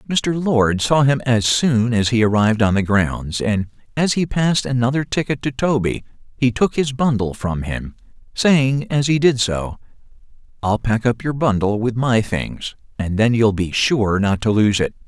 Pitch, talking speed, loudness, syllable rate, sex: 120 Hz, 190 wpm, -18 LUFS, 4.5 syllables/s, male